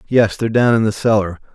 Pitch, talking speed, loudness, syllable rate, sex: 110 Hz, 235 wpm, -16 LUFS, 6.2 syllables/s, male